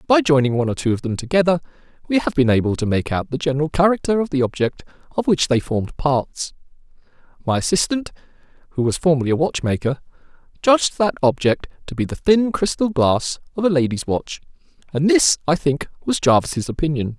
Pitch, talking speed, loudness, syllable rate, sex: 150 Hz, 180 wpm, -19 LUFS, 5.9 syllables/s, male